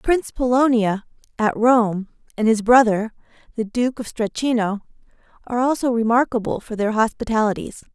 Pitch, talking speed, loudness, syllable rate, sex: 230 Hz, 130 wpm, -20 LUFS, 5.2 syllables/s, female